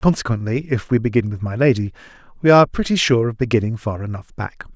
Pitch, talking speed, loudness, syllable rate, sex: 120 Hz, 200 wpm, -18 LUFS, 6.2 syllables/s, male